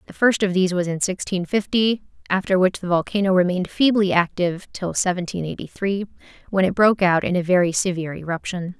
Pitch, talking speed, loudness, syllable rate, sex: 185 Hz, 190 wpm, -21 LUFS, 6.1 syllables/s, female